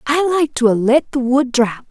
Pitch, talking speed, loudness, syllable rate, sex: 265 Hz, 250 wpm, -16 LUFS, 4.5 syllables/s, female